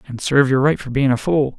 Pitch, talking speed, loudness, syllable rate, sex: 135 Hz, 300 wpm, -17 LUFS, 6.3 syllables/s, male